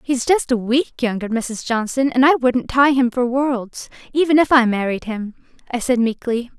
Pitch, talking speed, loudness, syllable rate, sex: 250 Hz, 200 wpm, -18 LUFS, 4.5 syllables/s, female